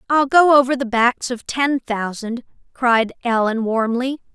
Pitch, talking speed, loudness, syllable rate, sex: 245 Hz, 150 wpm, -18 LUFS, 4.1 syllables/s, female